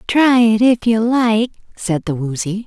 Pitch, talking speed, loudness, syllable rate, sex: 220 Hz, 180 wpm, -15 LUFS, 4.0 syllables/s, female